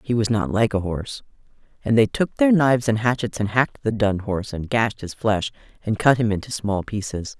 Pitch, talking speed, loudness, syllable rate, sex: 110 Hz, 225 wpm, -21 LUFS, 5.5 syllables/s, female